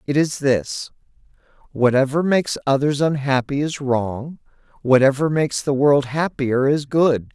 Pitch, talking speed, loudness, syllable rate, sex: 140 Hz, 130 wpm, -19 LUFS, 4.4 syllables/s, male